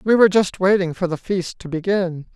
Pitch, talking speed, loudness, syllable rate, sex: 185 Hz, 230 wpm, -19 LUFS, 5.4 syllables/s, male